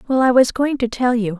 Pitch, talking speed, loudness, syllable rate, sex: 245 Hz, 300 wpm, -17 LUFS, 5.7 syllables/s, female